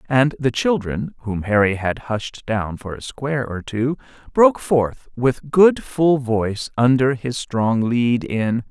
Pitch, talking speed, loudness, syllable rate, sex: 125 Hz, 165 wpm, -20 LUFS, 3.8 syllables/s, male